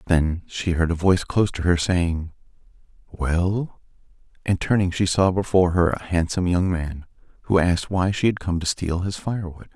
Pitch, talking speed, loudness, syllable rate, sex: 90 Hz, 185 wpm, -22 LUFS, 5.2 syllables/s, male